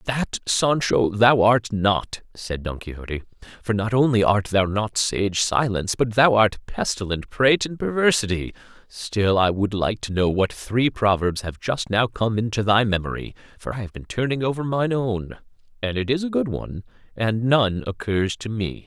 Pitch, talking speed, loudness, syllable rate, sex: 110 Hz, 180 wpm, -22 LUFS, 4.6 syllables/s, male